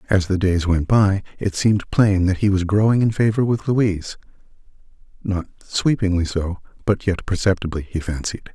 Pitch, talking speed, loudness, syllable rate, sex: 95 Hz, 160 wpm, -20 LUFS, 5.2 syllables/s, male